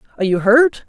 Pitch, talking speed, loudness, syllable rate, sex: 235 Hz, 205 wpm, -14 LUFS, 8.2 syllables/s, female